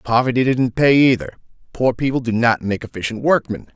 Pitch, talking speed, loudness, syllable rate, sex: 120 Hz, 175 wpm, -17 LUFS, 5.6 syllables/s, male